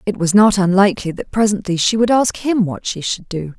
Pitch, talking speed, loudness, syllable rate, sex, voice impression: 195 Hz, 235 wpm, -16 LUFS, 5.5 syllables/s, female, feminine, adult-like, clear, slightly fluent, slightly sincere, friendly, reassuring